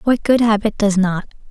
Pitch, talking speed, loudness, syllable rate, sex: 210 Hz, 200 wpm, -16 LUFS, 5.0 syllables/s, female